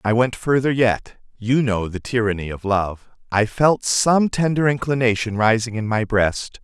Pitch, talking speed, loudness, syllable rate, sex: 115 Hz, 170 wpm, -19 LUFS, 4.4 syllables/s, male